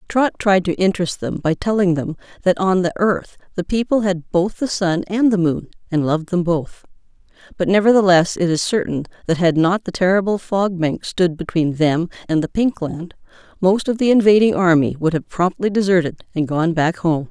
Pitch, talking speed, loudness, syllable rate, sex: 180 Hz, 200 wpm, -18 LUFS, 5.1 syllables/s, female